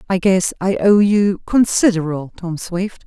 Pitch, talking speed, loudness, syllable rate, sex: 190 Hz, 155 wpm, -16 LUFS, 4.4 syllables/s, female